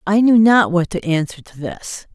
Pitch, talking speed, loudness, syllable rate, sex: 190 Hz, 225 wpm, -15 LUFS, 4.6 syllables/s, female